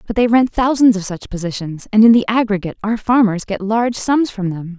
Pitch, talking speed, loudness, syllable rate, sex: 215 Hz, 225 wpm, -16 LUFS, 5.8 syllables/s, female